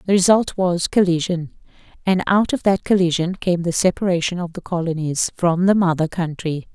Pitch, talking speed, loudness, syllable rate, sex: 175 Hz, 170 wpm, -19 LUFS, 5.2 syllables/s, female